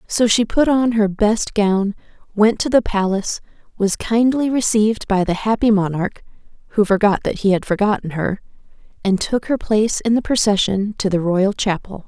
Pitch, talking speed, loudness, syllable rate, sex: 210 Hz, 180 wpm, -18 LUFS, 5.0 syllables/s, female